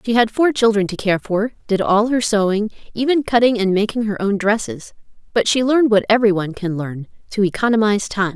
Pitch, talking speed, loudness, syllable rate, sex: 215 Hz, 200 wpm, -18 LUFS, 6.0 syllables/s, female